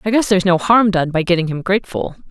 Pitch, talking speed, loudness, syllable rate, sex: 185 Hz, 260 wpm, -16 LUFS, 6.7 syllables/s, female